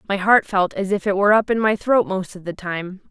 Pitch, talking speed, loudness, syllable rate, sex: 195 Hz, 290 wpm, -19 LUFS, 5.6 syllables/s, female